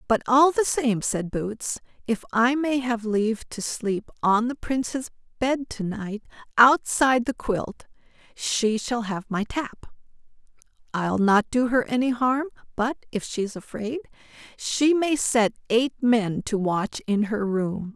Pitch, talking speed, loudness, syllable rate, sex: 235 Hz, 155 wpm, -24 LUFS, 3.9 syllables/s, female